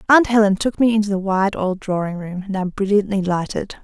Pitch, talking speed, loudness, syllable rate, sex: 200 Hz, 205 wpm, -19 LUFS, 5.3 syllables/s, female